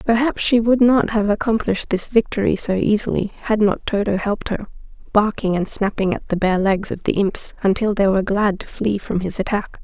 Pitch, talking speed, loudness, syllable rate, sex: 205 Hz, 205 wpm, -19 LUFS, 5.3 syllables/s, female